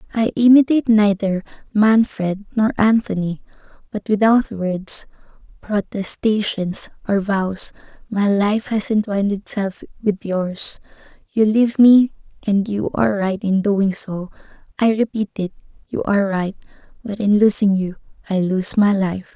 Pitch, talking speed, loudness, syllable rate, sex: 205 Hz, 130 wpm, -18 LUFS, 4.3 syllables/s, female